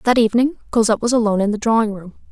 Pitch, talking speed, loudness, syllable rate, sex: 220 Hz, 235 wpm, -17 LUFS, 8.1 syllables/s, female